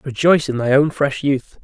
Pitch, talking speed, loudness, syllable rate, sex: 140 Hz, 220 wpm, -17 LUFS, 5.2 syllables/s, male